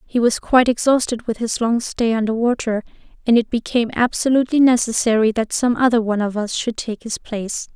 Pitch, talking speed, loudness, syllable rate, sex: 230 Hz, 195 wpm, -18 LUFS, 5.9 syllables/s, female